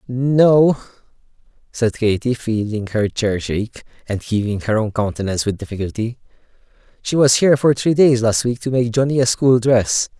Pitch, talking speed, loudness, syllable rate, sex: 115 Hz, 165 wpm, -17 LUFS, 5.0 syllables/s, male